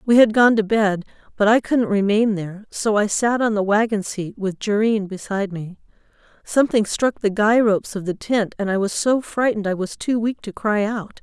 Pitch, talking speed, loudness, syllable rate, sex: 210 Hz, 220 wpm, -20 LUFS, 5.3 syllables/s, female